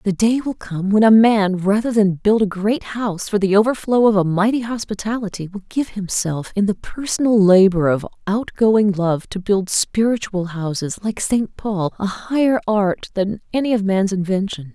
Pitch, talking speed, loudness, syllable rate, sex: 205 Hz, 180 wpm, -18 LUFS, 4.7 syllables/s, female